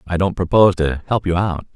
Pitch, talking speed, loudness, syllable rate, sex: 90 Hz, 240 wpm, -17 LUFS, 6.1 syllables/s, male